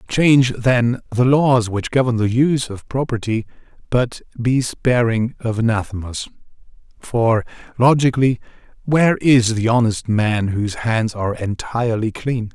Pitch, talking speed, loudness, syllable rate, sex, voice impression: 120 Hz, 130 wpm, -18 LUFS, 4.6 syllables/s, male, very masculine, adult-like, slightly thick, cool, intellectual, slightly kind